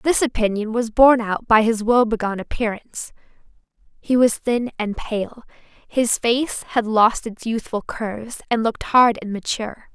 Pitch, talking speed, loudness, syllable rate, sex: 225 Hz, 155 wpm, -20 LUFS, 4.8 syllables/s, female